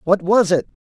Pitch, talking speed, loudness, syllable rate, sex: 185 Hz, 210 wpm, -17 LUFS, 4.9 syllables/s, male